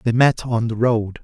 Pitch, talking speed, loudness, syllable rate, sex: 115 Hz, 240 wpm, -19 LUFS, 4.4 syllables/s, male